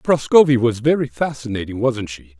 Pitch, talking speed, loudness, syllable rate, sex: 120 Hz, 150 wpm, -18 LUFS, 5.1 syllables/s, male